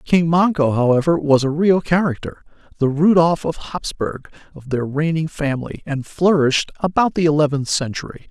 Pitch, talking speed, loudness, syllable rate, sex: 155 Hz, 150 wpm, -18 LUFS, 5.1 syllables/s, male